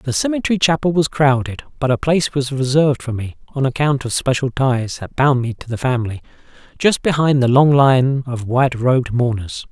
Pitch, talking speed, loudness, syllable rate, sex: 135 Hz, 200 wpm, -17 LUFS, 5.5 syllables/s, male